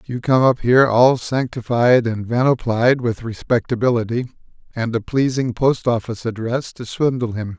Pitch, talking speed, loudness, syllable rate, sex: 120 Hz, 150 wpm, -18 LUFS, 4.8 syllables/s, male